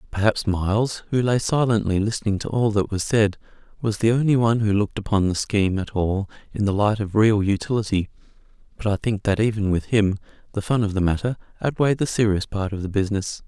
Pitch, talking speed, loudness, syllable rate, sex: 105 Hz, 210 wpm, -22 LUFS, 6.1 syllables/s, male